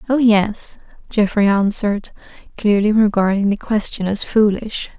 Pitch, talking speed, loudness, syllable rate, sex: 210 Hz, 120 wpm, -17 LUFS, 4.5 syllables/s, female